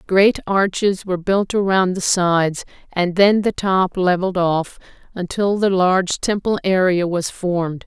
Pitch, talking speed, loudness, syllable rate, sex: 185 Hz, 150 wpm, -18 LUFS, 4.4 syllables/s, female